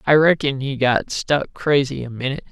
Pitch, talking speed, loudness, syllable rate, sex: 135 Hz, 190 wpm, -19 LUFS, 5.1 syllables/s, male